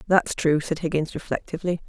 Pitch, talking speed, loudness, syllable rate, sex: 165 Hz, 160 wpm, -25 LUFS, 5.9 syllables/s, female